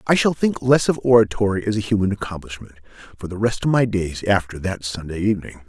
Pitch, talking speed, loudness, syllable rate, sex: 105 Hz, 210 wpm, -20 LUFS, 6.1 syllables/s, male